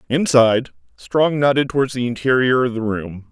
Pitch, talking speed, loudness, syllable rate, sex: 125 Hz, 165 wpm, -18 LUFS, 5.3 syllables/s, male